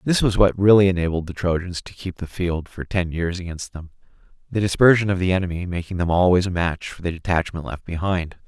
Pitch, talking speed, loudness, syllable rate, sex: 90 Hz, 220 wpm, -21 LUFS, 5.8 syllables/s, male